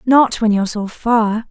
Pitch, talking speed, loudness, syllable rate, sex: 225 Hz, 200 wpm, -16 LUFS, 4.4 syllables/s, female